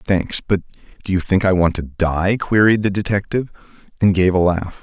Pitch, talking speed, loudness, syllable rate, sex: 95 Hz, 200 wpm, -18 LUFS, 5.3 syllables/s, male